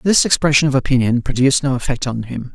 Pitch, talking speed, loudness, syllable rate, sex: 135 Hz, 210 wpm, -16 LUFS, 6.5 syllables/s, male